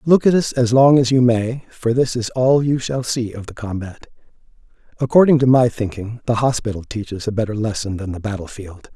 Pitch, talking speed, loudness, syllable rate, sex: 120 Hz, 215 wpm, -18 LUFS, 5.4 syllables/s, male